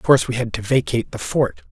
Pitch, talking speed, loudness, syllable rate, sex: 125 Hz, 280 wpm, -20 LUFS, 6.8 syllables/s, male